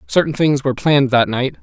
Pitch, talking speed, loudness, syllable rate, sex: 130 Hz, 220 wpm, -16 LUFS, 6.3 syllables/s, male